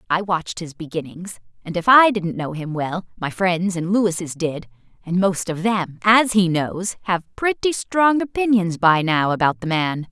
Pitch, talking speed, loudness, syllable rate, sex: 185 Hz, 180 wpm, -20 LUFS, 4.5 syllables/s, female